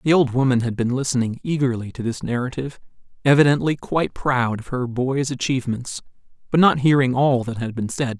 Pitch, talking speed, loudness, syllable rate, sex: 130 Hz, 185 wpm, -21 LUFS, 5.7 syllables/s, male